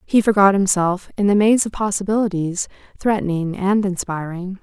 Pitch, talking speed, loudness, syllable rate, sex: 195 Hz, 145 wpm, -19 LUFS, 5.1 syllables/s, female